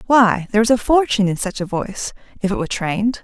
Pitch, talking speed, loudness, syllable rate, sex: 210 Hz, 240 wpm, -18 LUFS, 6.9 syllables/s, female